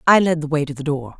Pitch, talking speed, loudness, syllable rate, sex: 150 Hz, 350 wpm, -19 LUFS, 6.7 syllables/s, female